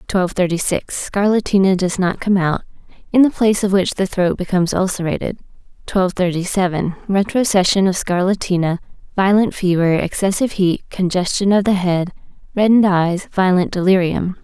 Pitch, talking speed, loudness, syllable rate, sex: 190 Hz, 145 wpm, -17 LUFS, 5.5 syllables/s, female